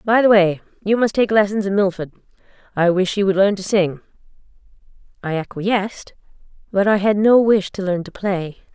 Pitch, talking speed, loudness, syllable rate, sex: 195 Hz, 185 wpm, -18 LUFS, 5.3 syllables/s, female